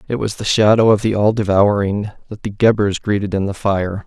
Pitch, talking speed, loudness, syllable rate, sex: 105 Hz, 220 wpm, -16 LUFS, 5.3 syllables/s, male